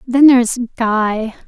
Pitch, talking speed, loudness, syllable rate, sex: 235 Hz, 120 wpm, -14 LUFS, 3.6 syllables/s, female